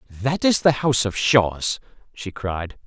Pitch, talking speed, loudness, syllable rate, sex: 115 Hz, 165 wpm, -20 LUFS, 3.9 syllables/s, male